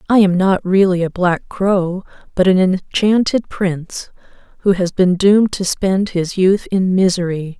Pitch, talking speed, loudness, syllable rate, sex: 185 Hz, 165 wpm, -15 LUFS, 4.3 syllables/s, female